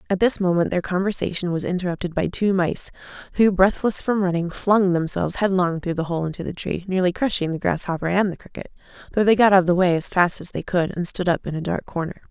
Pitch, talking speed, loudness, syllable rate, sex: 180 Hz, 240 wpm, -21 LUFS, 6.1 syllables/s, female